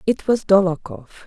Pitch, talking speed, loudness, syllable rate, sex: 185 Hz, 145 wpm, -18 LUFS, 5.2 syllables/s, female